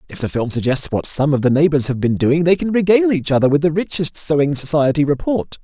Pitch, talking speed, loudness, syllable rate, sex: 150 Hz, 245 wpm, -16 LUFS, 6.2 syllables/s, male